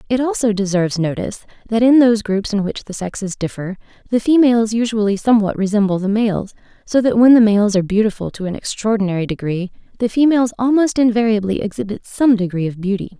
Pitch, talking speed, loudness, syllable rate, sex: 215 Hz, 180 wpm, -16 LUFS, 6.3 syllables/s, female